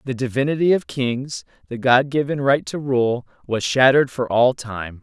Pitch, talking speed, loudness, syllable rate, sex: 130 Hz, 180 wpm, -19 LUFS, 4.7 syllables/s, male